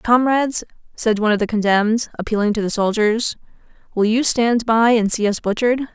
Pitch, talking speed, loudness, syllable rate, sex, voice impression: 220 Hz, 180 wpm, -18 LUFS, 5.7 syllables/s, female, feminine, adult-like, slightly cute, slightly sincere, friendly, slightly elegant